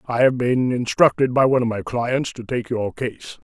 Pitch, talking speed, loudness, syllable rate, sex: 125 Hz, 220 wpm, -20 LUFS, 5.6 syllables/s, male